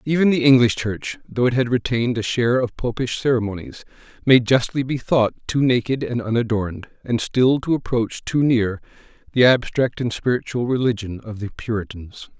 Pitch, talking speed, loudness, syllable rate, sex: 120 Hz, 170 wpm, -20 LUFS, 5.3 syllables/s, male